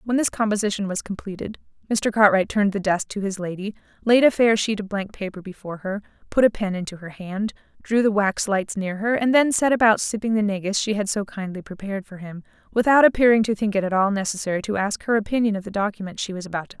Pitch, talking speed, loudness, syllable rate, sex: 205 Hz, 245 wpm, -22 LUFS, 6.4 syllables/s, female